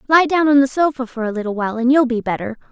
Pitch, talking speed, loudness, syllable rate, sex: 255 Hz, 290 wpm, -17 LUFS, 7.1 syllables/s, female